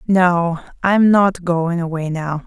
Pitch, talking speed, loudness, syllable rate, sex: 175 Hz, 145 wpm, -17 LUFS, 3.3 syllables/s, female